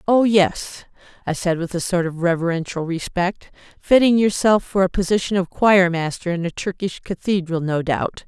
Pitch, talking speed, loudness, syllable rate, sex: 180 Hz, 175 wpm, -19 LUFS, 5.0 syllables/s, female